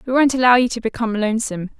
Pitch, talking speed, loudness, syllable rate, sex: 235 Hz, 235 wpm, -18 LUFS, 8.0 syllables/s, female